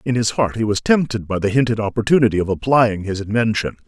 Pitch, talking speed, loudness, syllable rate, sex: 110 Hz, 215 wpm, -18 LUFS, 6.2 syllables/s, male